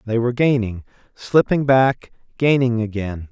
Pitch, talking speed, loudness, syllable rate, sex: 120 Hz, 90 wpm, -18 LUFS, 4.6 syllables/s, male